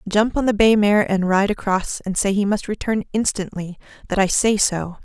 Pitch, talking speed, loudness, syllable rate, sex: 200 Hz, 200 wpm, -19 LUFS, 5.0 syllables/s, female